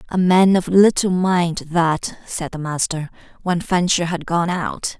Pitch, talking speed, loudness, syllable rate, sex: 175 Hz, 180 wpm, -18 LUFS, 3.9 syllables/s, female